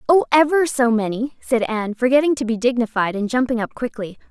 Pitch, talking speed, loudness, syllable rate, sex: 245 Hz, 195 wpm, -19 LUFS, 5.8 syllables/s, female